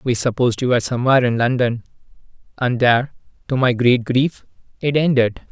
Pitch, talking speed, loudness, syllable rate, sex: 125 Hz, 165 wpm, -18 LUFS, 6.0 syllables/s, male